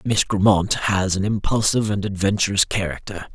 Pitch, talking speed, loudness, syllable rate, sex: 100 Hz, 145 wpm, -20 LUFS, 5.4 syllables/s, male